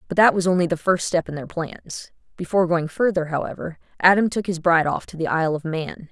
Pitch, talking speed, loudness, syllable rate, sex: 170 Hz, 235 wpm, -21 LUFS, 6.0 syllables/s, female